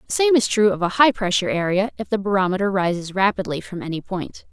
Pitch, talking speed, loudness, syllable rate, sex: 195 Hz, 225 wpm, -20 LUFS, 6.3 syllables/s, female